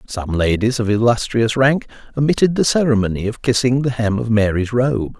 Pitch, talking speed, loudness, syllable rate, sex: 115 Hz, 175 wpm, -17 LUFS, 5.3 syllables/s, male